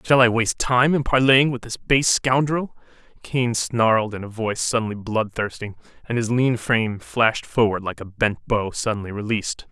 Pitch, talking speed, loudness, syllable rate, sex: 115 Hz, 185 wpm, -21 LUFS, 5.1 syllables/s, male